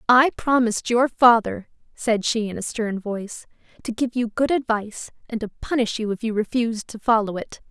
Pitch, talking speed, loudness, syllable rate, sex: 225 Hz, 195 wpm, -22 LUFS, 5.3 syllables/s, female